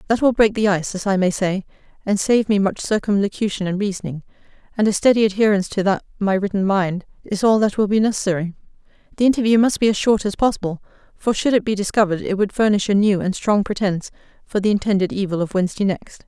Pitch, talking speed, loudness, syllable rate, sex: 200 Hz, 215 wpm, -19 LUFS, 6.6 syllables/s, female